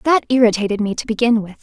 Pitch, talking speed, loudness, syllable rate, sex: 230 Hz, 220 wpm, -17 LUFS, 6.4 syllables/s, female